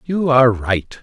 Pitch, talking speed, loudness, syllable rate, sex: 125 Hz, 175 wpm, -15 LUFS, 4.4 syllables/s, male